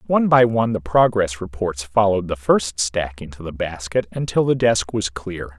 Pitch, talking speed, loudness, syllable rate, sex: 95 Hz, 195 wpm, -20 LUFS, 5.1 syllables/s, male